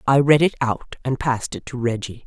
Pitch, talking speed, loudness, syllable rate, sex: 130 Hz, 240 wpm, -21 LUFS, 5.5 syllables/s, female